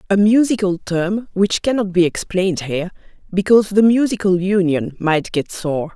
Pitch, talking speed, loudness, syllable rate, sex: 190 Hz, 150 wpm, -17 LUFS, 5.0 syllables/s, female